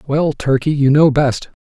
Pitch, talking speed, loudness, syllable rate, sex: 140 Hz, 185 wpm, -14 LUFS, 4.4 syllables/s, male